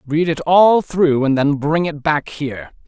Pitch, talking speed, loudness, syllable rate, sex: 150 Hz, 210 wpm, -16 LUFS, 4.4 syllables/s, male